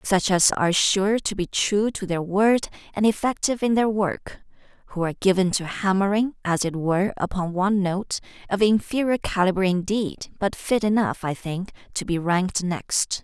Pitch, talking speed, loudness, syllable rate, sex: 195 Hz, 170 wpm, -23 LUFS, 5.0 syllables/s, female